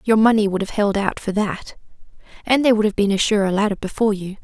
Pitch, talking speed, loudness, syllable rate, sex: 205 Hz, 245 wpm, -19 LUFS, 6.6 syllables/s, female